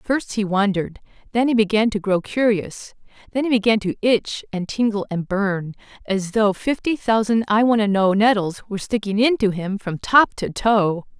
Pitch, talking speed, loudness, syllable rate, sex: 210 Hz, 190 wpm, -20 LUFS, 4.8 syllables/s, female